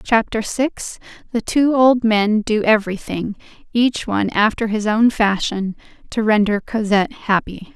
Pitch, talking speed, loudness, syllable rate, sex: 220 Hz, 130 wpm, -18 LUFS, 4.4 syllables/s, female